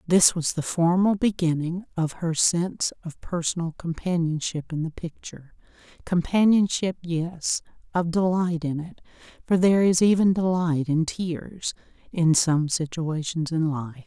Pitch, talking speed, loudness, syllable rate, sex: 170 Hz, 130 wpm, -24 LUFS, 4.3 syllables/s, female